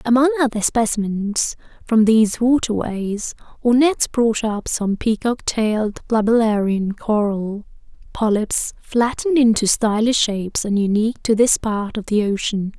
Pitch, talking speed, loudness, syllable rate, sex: 220 Hz, 130 wpm, -19 LUFS, 4.4 syllables/s, female